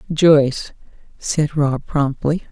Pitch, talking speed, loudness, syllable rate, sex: 145 Hz, 95 wpm, -17 LUFS, 3.4 syllables/s, female